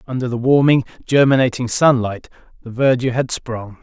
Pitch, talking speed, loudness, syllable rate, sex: 125 Hz, 140 wpm, -16 LUFS, 5.4 syllables/s, male